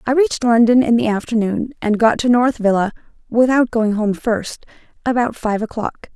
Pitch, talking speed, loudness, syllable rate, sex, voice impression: 230 Hz, 155 wpm, -17 LUFS, 5.0 syllables/s, female, very feminine, young, slightly adult-like, thin, very tensed, slightly powerful, bright, hard, clear, fluent, cute, slightly intellectual, refreshing, very sincere, slightly calm, friendly, reassuring, slightly unique, slightly elegant, wild, slightly sweet, lively, slightly strict, slightly intense, slightly sharp